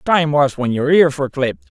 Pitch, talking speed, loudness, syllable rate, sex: 145 Hz, 235 wpm, -16 LUFS, 5.7 syllables/s, male